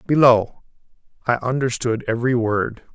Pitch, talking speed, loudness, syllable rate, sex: 120 Hz, 100 wpm, -20 LUFS, 4.9 syllables/s, male